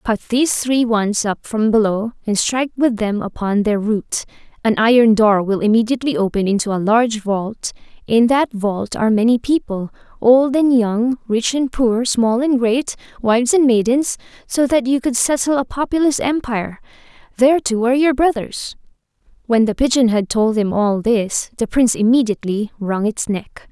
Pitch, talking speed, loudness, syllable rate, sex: 235 Hz, 175 wpm, -17 LUFS, 5.0 syllables/s, female